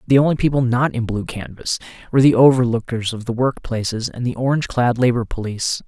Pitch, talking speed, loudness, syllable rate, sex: 120 Hz, 205 wpm, -19 LUFS, 6.1 syllables/s, male